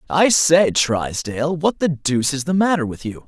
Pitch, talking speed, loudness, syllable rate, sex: 150 Hz, 200 wpm, -18 LUFS, 4.9 syllables/s, male